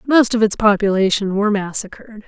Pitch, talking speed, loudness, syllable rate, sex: 210 Hz, 160 wpm, -16 LUFS, 5.7 syllables/s, female